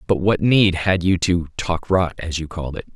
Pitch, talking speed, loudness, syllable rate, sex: 90 Hz, 245 wpm, -19 LUFS, 4.5 syllables/s, male